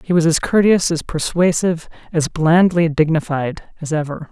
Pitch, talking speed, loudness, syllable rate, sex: 160 Hz, 155 wpm, -17 LUFS, 4.8 syllables/s, female